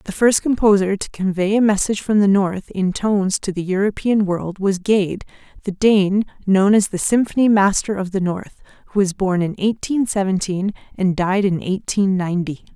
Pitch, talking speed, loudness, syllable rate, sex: 195 Hz, 185 wpm, -18 LUFS, 4.9 syllables/s, female